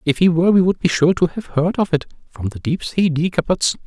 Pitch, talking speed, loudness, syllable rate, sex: 165 Hz, 250 wpm, -18 LUFS, 5.7 syllables/s, male